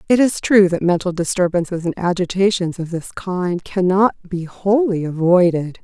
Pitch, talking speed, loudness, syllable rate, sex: 180 Hz, 165 wpm, -18 LUFS, 4.8 syllables/s, female